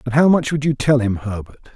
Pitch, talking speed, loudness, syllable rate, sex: 130 Hz, 275 wpm, -17 LUFS, 6.0 syllables/s, male